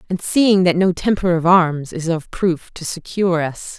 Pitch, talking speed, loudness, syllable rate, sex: 175 Hz, 205 wpm, -17 LUFS, 4.5 syllables/s, female